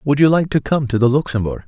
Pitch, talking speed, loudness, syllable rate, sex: 135 Hz, 285 wpm, -16 LUFS, 6.2 syllables/s, male